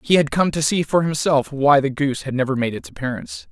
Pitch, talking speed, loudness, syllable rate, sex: 145 Hz, 255 wpm, -20 LUFS, 6.2 syllables/s, male